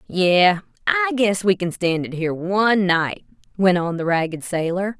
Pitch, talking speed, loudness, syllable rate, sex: 185 Hz, 180 wpm, -20 LUFS, 4.8 syllables/s, female